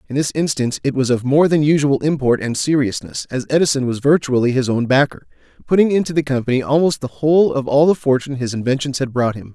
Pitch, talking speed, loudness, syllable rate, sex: 140 Hz, 220 wpm, -17 LUFS, 6.3 syllables/s, male